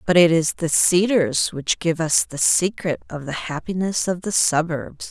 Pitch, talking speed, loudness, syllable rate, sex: 170 Hz, 190 wpm, -20 LUFS, 4.5 syllables/s, female